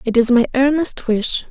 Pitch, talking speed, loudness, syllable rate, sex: 250 Hz, 200 wpm, -16 LUFS, 4.7 syllables/s, female